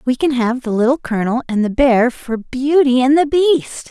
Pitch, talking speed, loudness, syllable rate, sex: 260 Hz, 215 wpm, -15 LUFS, 4.8 syllables/s, female